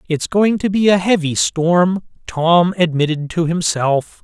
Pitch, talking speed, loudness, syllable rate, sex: 170 Hz, 155 wpm, -16 LUFS, 4.0 syllables/s, male